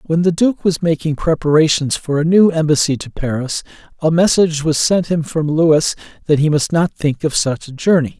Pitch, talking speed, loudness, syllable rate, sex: 155 Hz, 205 wpm, -15 LUFS, 5.1 syllables/s, male